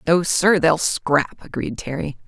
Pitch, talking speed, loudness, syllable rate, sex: 160 Hz, 130 wpm, -20 LUFS, 3.9 syllables/s, female